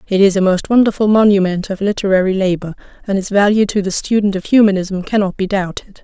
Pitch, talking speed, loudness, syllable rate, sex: 195 Hz, 200 wpm, -15 LUFS, 6.1 syllables/s, female